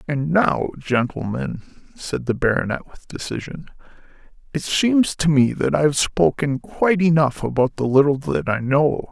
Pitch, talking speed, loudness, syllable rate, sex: 145 Hz, 160 wpm, -20 LUFS, 4.5 syllables/s, male